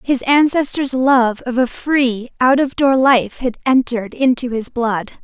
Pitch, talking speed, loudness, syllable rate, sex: 250 Hz, 170 wpm, -16 LUFS, 4.1 syllables/s, female